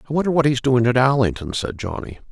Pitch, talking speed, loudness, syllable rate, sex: 125 Hz, 235 wpm, -19 LUFS, 6.5 syllables/s, male